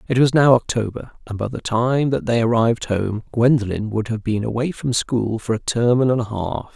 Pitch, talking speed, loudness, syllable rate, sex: 115 Hz, 220 wpm, -19 LUFS, 5.0 syllables/s, male